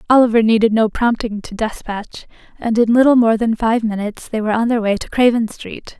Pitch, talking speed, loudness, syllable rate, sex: 225 Hz, 210 wpm, -16 LUFS, 5.9 syllables/s, female